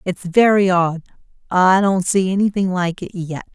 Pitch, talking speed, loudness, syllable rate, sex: 185 Hz, 170 wpm, -17 LUFS, 4.5 syllables/s, female